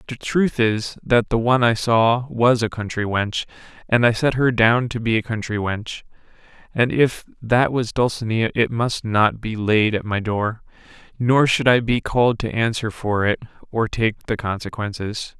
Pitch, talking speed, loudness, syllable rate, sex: 115 Hz, 185 wpm, -20 LUFS, 4.4 syllables/s, male